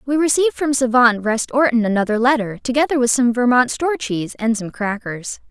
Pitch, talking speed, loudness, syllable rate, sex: 245 Hz, 185 wpm, -17 LUFS, 5.7 syllables/s, female